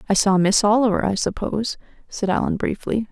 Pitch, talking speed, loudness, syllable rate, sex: 205 Hz, 175 wpm, -20 LUFS, 5.7 syllables/s, female